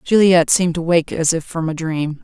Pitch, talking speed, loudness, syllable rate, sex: 165 Hz, 240 wpm, -17 LUFS, 5.6 syllables/s, female